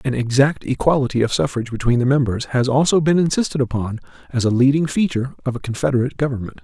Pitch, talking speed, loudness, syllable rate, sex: 130 Hz, 190 wpm, -19 LUFS, 6.8 syllables/s, male